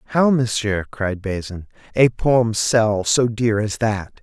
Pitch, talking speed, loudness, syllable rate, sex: 110 Hz, 155 wpm, -19 LUFS, 3.6 syllables/s, male